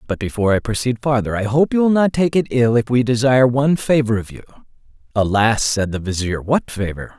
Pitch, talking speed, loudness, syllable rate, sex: 120 Hz, 215 wpm, -17 LUFS, 5.9 syllables/s, male